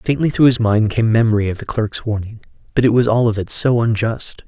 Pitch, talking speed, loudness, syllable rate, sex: 115 Hz, 240 wpm, -16 LUFS, 5.6 syllables/s, male